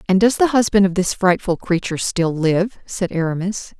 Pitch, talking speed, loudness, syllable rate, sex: 190 Hz, 190 wpm, -18 LUFS, 5.1 syllables/s, female